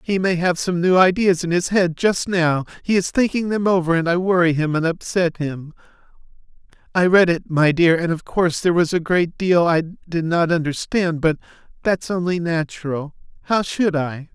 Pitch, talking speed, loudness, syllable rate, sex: 170 Hz, 190 wpm, -19 LUFS, 5.0 syllables/s, male